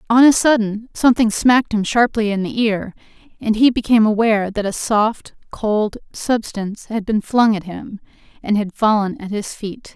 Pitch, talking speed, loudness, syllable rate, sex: 215 Hz, 180 wpm, -17 LUFS, 4.9 syllables/s, female